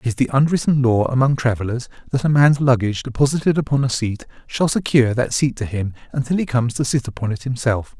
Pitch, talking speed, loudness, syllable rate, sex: 125 Hz, 220 wpm, -19 LUFS, 6.3 syllables/s, male